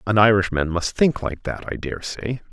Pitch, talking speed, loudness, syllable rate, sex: 100 Hz, 190 wpm, -21 LUFS, 5.2 syllables/s, male